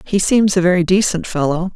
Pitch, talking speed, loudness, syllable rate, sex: 185 Hz, 205 wpm, -15 LUFS, 5.5 syllables/s, female